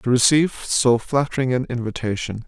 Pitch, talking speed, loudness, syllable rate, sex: 125 Hz, 145 wpm, -20 LUFS, 5.6 syllables/s, male